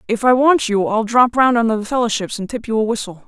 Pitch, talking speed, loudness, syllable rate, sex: 225 Hz, 275 wpm, -16 LUFS, 6.1 syllables/s, female